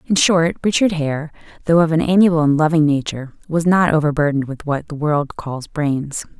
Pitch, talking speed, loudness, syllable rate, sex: 155 Hz, 195 wpm, -17 LUFS, 5.4 syllables/s, female